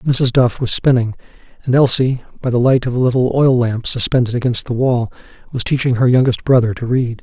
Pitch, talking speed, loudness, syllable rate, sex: 125 Hz, 210 wpm, -15 LUFS, 5.6 syllables/s, male